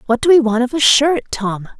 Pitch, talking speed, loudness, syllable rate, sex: 255 Hz, 270 wpm, -14 LUFS, 5.4 syllables/s, female